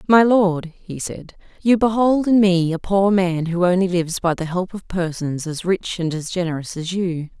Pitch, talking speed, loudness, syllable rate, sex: 185 Hz, 210 wpm, -19 LUFS, 4.7 syllables/s, female